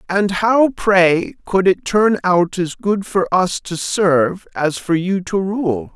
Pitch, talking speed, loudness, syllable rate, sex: 185 Hz, 180 wpm, -17 LUFS, 3.5 syllables/s, male